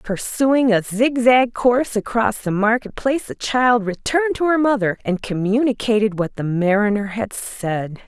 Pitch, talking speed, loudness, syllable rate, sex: 225 Hz, 150 wpm, -19 LUFS, 4.7 syllables/s, female